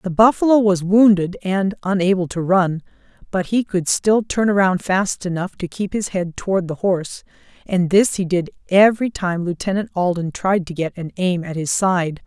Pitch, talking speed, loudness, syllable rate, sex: 185 Hz, 190 wpm, -18 LUFS, 4.9 syllables/s, female